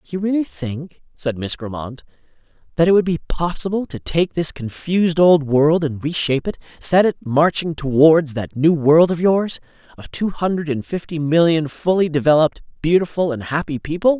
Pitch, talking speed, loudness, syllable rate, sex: 160 Hz, 170 wpm, -18 LUFS, 5.0 syllables/s, male